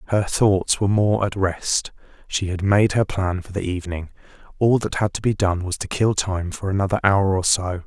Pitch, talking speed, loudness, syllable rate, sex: 95 Hz, 220 wpm, -21 LUFS, 5.0 syllables/s, male